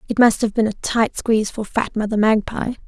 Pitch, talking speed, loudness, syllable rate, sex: 220 Hz, 230 wpm, -19 LUFS, 5.4 syllables/s, female